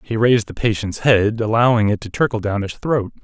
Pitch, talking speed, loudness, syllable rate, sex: 110 Hz, 225 wpm, -18 LUFS, 5.6 syllables/s, male